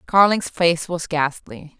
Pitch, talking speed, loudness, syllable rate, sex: 170 Hz, 135 wpm, -19 LUFS, 3.6 syllables/s, female